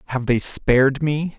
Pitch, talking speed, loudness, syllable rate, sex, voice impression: 135 Hz, 175 wpm, -19 LUFS, 4.3 syllables/s, male, very masculine, very adult-like, very middle-aged, very thick, tensed, very powerful, bright, slightly hard, slightly muffled, fluent, slightly raspy, cool, intellectual, slightly refreshing, very sincere, very calm, mature, friendly, reassuring, slightly unique, slightly elegant, slightly wild, slightly sweet, lively, kind, slightly intense